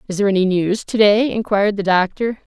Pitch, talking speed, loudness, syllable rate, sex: 205 Hz, 190 wpm, -17 LUFS, 6.2 syllables/s, female